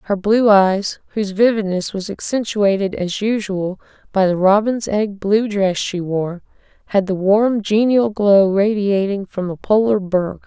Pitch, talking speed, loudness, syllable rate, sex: 200 Hz, 155 wpm, -17 LUFS, 4.2 syllables/s, female